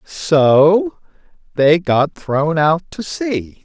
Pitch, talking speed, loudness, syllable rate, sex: 165 Hz, 115 wpm, -15 LUFS, 2.3 syllables/s, male